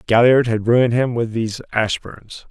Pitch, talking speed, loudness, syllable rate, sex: 115 Hz, 170 wpm, -17 LUFS, 5.0 syllables/s, male